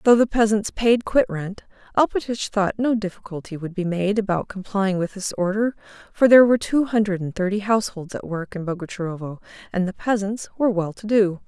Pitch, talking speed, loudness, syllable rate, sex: 200 Hz, 190 wpm, -22 LUFS, 5.7 syllables/s, female